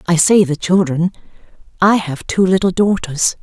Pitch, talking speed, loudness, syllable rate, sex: 180 Hz, 155 wpm, -15 LUFS, 4.7 syllables/s, female